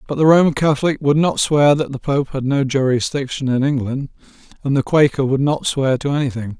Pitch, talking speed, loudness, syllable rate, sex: 140 Hz, 210 wpm, -17 LUFS, 5.6 syllables/s, male